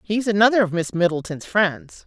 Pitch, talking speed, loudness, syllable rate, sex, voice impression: 190 Hz, 175 wpm, -20 LUFS, 5.1 syllables/s, female, masculine, adult-like, thin, tensed, bright, slightly muffled, fluent, intellectual, friendly, unique, lively